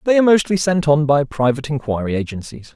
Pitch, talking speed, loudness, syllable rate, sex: 150 Hz, 195 wpm, -17 LUFS, 6.5 syllables/s, male